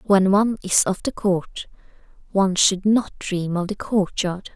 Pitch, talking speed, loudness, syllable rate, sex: 195 Hz, 170 wpm, -21 LUFS, 4.3 syllables/s, female